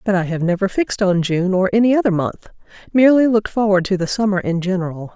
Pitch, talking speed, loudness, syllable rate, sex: 195 Hz, 210 wpm, -17 LUFS, 6.5 syllables/s, female